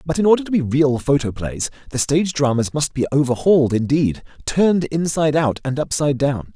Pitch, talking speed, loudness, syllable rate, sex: 140 Hz, 185 wpm, -19 LUFS, 5.8 syllables/s, male